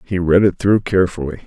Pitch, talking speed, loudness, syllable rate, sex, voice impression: 90 Hz, 205 wpm, -16 LUFS, 6.1 syllables/s, male, masculine, middle-aged, thick, tensed, hard, muffled, slightly raspy, cool, mature, wild, slightly kind, modest